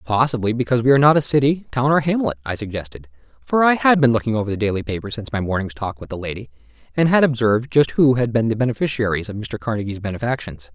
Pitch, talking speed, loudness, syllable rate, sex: 120 Hz, 230 wpm, -19 LUFS, 7.0 syllables/s, male